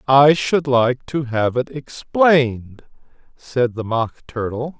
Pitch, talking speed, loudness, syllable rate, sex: 130 Hz, 140 wpm, -18 LUFS, 3.4 syllables/s, male